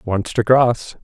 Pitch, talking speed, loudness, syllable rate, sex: 115 Hz, 175 wpm, -16 LUFS, 3.1 syllables/s, male